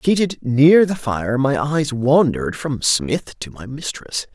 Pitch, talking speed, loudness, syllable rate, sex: 135 Hz, 165 wpm, -18 LUFS, 3.9 syllables/s, male